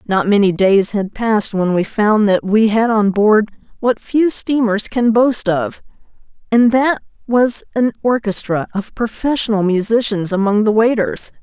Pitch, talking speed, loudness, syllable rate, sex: 215 Hz, 160 wpm, -15 LUFS, 4.4 syllables/s, female